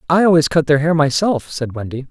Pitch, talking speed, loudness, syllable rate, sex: 150 Hz, 230 wpm, -16 LUFS, 5.7 syllables/s, male